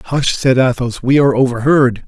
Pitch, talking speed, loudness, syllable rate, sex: 130 Hz, 175 wpm, -13 LUFS, 5.5 syllables/s, male